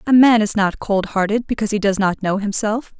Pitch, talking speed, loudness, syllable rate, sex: 210 Hz, 240 wpm, -18 LUFS, 5.6 syllables/s, female